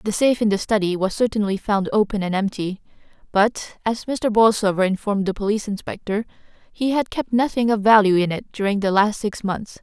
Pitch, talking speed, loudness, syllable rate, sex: 210 Hz, 195 wpm, -20 LUFS, 5.6 syllables/s, female